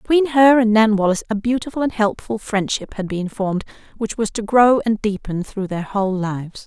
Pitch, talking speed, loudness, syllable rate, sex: 215 Hz, 205 wpm, -19 LUFS, 5.5 syllables/s, female